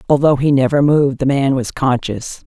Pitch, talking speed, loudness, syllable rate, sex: 135 Hz, 190 wpm, -15 LUFS, 5.2 syllables/s, female